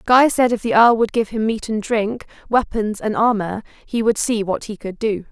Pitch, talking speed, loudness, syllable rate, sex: 220 Hz, 235 wpm, -19 LUFS, 4.8 syllables/s, female